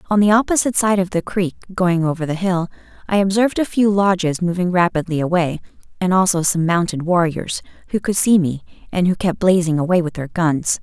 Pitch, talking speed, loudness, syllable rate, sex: 180 Hz, 200 wpm, -18 LUFS, 5.8 syllables/s, female